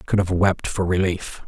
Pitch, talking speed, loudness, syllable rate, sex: 90 Hz, 245 wpm, -21 LUFS, 5.2 syllables/s, male